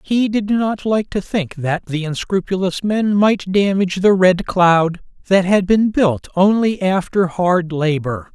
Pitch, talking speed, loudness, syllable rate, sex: 185 Hz, 165 wpm, -17 LUFS, 4.0 syllables/s, male